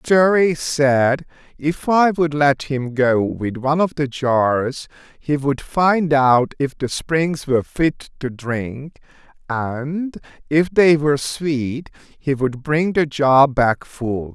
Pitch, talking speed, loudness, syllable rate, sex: 145 Hz, 150 wpm, -18 LUFS, 3.2 syllables/s, male